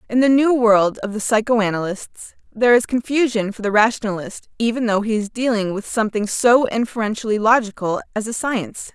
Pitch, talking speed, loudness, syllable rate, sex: 225 Hz, 175 wpm, -18 LUFS, 5.7 syllables/s, female